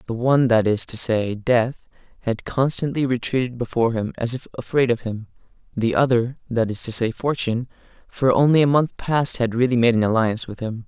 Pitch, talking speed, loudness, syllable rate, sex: 120 Hz, 175 wpm, -21 LUFS, 5.5 syllables/s, male